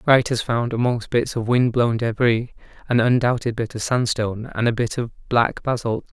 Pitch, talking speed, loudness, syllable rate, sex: 120 Hz, 195 wpm, -21 LUFS, 5.0 syllables/s, male